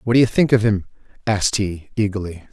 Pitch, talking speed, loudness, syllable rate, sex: 105 Hz, 215 wpm, -19 LUFS, 6.1 syllables/s, male